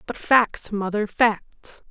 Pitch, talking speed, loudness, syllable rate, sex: 215 Hz, 125 wpm, -21 LUFS, 2.9 syllables/s, female